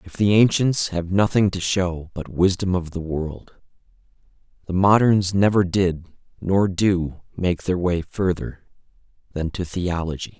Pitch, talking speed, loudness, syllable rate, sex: 90 Hz, 145 wpm, -21 LUFS, 4.0 syllables/s, male